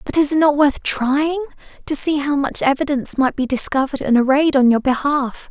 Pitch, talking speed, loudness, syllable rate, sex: 280 Hz, 205 wpm, -17 LUFS, 5.5 syllables/s, female